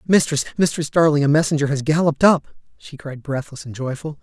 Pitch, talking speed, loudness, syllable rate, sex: 150 Hz, 185 wpm, -19 LUFS, 5.9 syllables/s, male